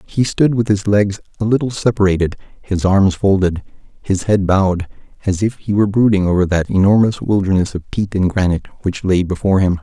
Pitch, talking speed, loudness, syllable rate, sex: 100 Hz, 190 wpm, -16 LUFS, 5.7 syllables/s, male